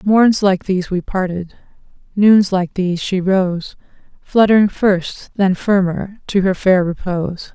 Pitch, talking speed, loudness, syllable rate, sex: 190 Hz, 145 wpm, -16 LUFS, 4.2 syllables/s, female